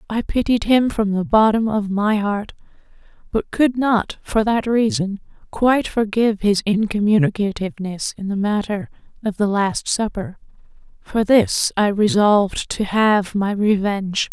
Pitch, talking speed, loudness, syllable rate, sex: 210 Hz, 140 wpm, -19 LUFS, 4.4 syllables/s, female